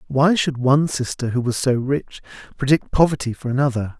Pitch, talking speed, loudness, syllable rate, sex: 130 Hz, 180 wpm, -20 LUFS, 5.5 syllables/s, male